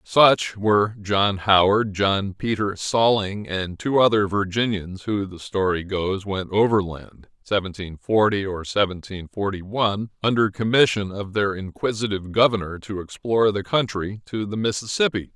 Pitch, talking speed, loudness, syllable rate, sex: 100 Hz, 140 wpm, -22 LUFS, 4.0 syllables/s, male